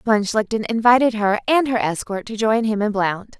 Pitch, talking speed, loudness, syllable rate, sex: 220 Hz, 210 wpm, -19 LUFS, 5.0 syllables/s, female